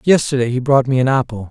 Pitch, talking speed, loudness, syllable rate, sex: 130 Hz, 240 wpm, -16 LUFS, 6.4 syllables/s, male